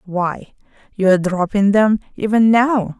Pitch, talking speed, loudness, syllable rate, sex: 205 Hz, 140 wpm, -16 LUFS, 4.3 syllables/s, female